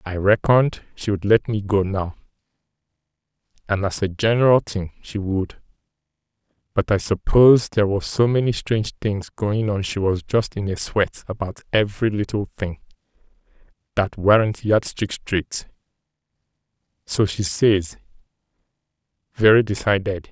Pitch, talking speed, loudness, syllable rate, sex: 100 Hz, 135 wpm, -20 LUFS, 4.4 syllables/s, male